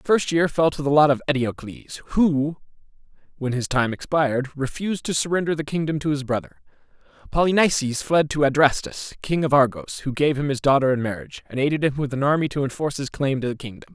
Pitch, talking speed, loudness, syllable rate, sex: 145 Hz, 210 wpm, -22 LUFS, 6.2 syllables/s, male